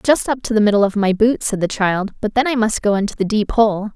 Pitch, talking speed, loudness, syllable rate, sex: 215 Hz, 305 wpm, -17 LUFS, 5.7 syllables/s, female